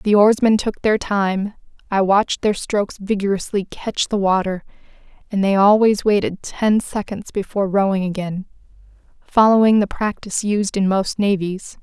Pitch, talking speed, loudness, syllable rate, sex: 200 Hz, 145 wpm, -18 LUFS, 4.8 syllables/s, female